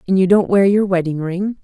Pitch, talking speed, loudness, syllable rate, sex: 185 Hz, 255 wpm, -16 LUFS, 5.5 syllables/s, female